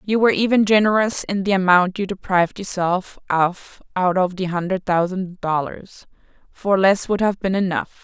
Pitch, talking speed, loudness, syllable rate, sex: 190 Hz, 165 wpm, -19 LUFS, 4.8 syllables/s, female